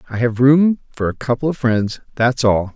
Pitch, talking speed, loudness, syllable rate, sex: 125 Hz, 220 wpm, -17 LUFS, 4.9 syllables/s, male